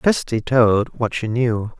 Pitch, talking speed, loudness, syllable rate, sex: 115 Hz, 165 wpm, -19 LUFS, 3.4 syllables/s, male